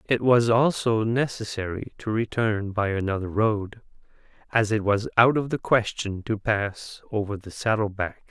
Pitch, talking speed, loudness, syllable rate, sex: 110 Hz, 160 wpm, -24 LUFS, 4.4 syllables/s, male